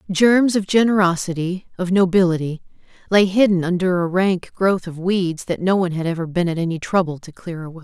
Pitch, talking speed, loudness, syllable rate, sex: 180 Hz, 190 wpm, -19 LUFS, 5.5 syllables/s, female